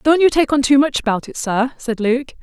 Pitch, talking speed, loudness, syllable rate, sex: 260 Hz, 275 wpm, -17 LUFS, 5.0 syllables/s, female